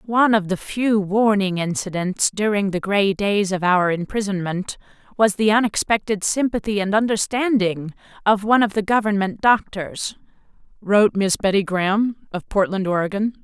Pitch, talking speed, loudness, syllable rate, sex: 200 Hz, 145 wpm, -20 LUFS, 4.8 syllables/s, female